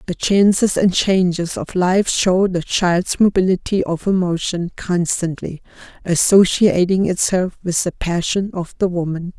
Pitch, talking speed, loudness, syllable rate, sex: 180 Hz, 135 wpm, -17 LUFS, 4.2 syllables/s, female